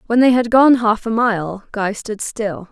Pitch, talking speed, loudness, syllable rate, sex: 220 Hz, 220 wpm, -16 LUFS, 4.0 syllables/s, female